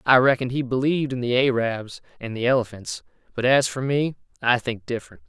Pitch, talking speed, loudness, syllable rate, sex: 125 Hz, 205 wpm, -23 LUFS, 5.9 syllables/s, male